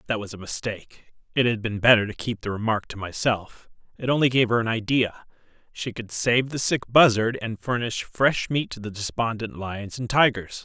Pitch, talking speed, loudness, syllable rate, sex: 115 Hz, 190 wpm, -24 LUFS, 5.1 syllables/s, male